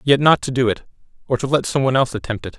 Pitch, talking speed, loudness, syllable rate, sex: 130 Hz, 280 wpm, -19 LUFS, 7.7 syllables/s, male